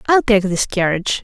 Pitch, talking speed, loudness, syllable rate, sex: 205 Hz, 195 wpm, -16 LUFS, 5.7 syllables/s, female